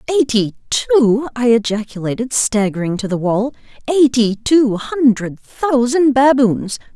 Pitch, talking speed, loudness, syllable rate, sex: 240 Hz, 105 wpm, -15 LUFS, 4.1 syllables/s, female